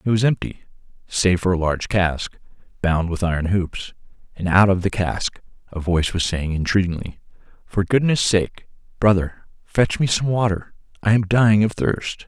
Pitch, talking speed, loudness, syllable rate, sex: 95 Hz, 170 wpm, -20 LUFS, 4.9 syllables/s, male